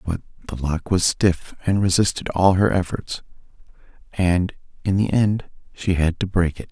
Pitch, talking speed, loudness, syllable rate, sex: 90 Hz, 170 wpm, -21 LUFS, 4.6 syllables/s, male